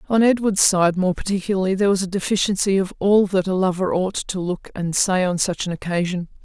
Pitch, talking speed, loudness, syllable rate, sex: 190 Hz, 215 wpm, -20 LUFS, 5.8 syllables/s, female